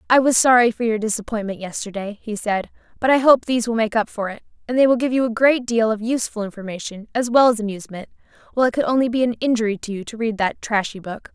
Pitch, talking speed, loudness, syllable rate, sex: 225 Hz, 250 wpm, -20 LUFS, 6.6 syllables/s, female